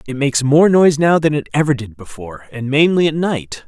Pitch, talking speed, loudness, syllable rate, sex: 140 Hz, 210 wpm, -15 LUFS, 5.9 syllables/s, male